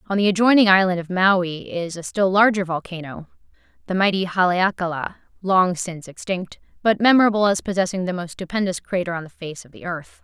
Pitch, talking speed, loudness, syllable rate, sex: 185 Hz, 180 wpm, -20 LUFS, 5.6 syllables/s, female